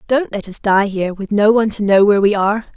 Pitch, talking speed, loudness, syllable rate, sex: 205 Hz, 285 wpm, -15 LUFS, 6.8 syllables/s, female